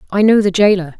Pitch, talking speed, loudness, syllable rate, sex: 195 Hz, 240 wpm, -13 LUFS, 6.7 syllables/s, female